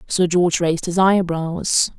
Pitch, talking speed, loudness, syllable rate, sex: 175 Hz, 150 wpm, -18 LUFS, 4.4 syllables/s, female